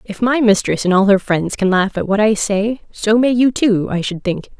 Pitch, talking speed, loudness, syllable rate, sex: 210 Hz, 260 wpm, -15 LUFS, 4.9 syllables/s, female